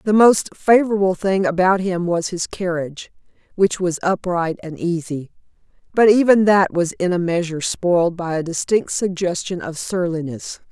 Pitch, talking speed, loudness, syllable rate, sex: 180 Hz, 155 wpm, -19 LUFS, 4.8 syllables/s, female